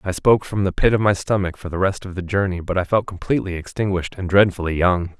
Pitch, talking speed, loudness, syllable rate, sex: 95 Hz, 255 wpm, -20 LUFS, 6.5 syllables/s, male